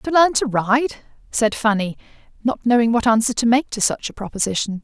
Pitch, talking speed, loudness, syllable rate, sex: 230 Hz, 200 wpm, -19 LUFS, 5.4 syllables/s, female